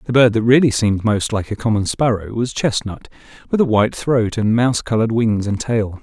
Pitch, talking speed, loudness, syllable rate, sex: 115 Hz, 220 wpm, -17 LUFS, 5.7 syllables/s, male